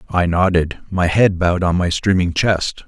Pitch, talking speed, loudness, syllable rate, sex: 90 Hz, 190 wpm, -17 LUFS, 4.6 syllables/s, male